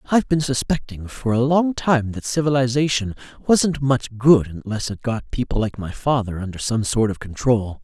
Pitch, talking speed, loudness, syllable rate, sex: 125 Hz, 185 wpm, -21 LUFS, 5.0 syllables/s, male